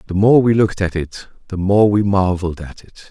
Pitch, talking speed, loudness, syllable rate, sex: 95 Hz, 230 wpm, -16 LUFS, 5.5 syllables/s, male